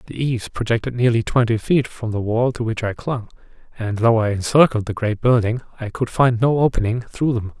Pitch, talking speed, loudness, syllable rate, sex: 115 Hz, 215 wpm, -19 LUFS, 5.5 syllables/s, male